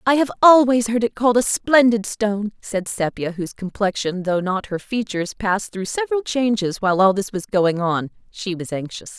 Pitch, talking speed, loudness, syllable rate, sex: 210 Hz, 195 wpm, -20 LUFS, 5.4 syllables/s, female